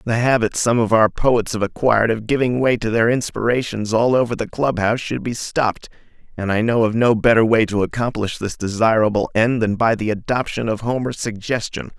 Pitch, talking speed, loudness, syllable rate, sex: 115 Hz, 205 wpm, -18 LUFS, 5.5 syllables/s, male